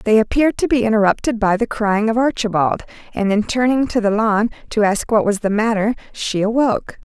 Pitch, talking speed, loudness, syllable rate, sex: 220 Hz, 205 wpm, -17 LUFS, 5.6 syllables/s, female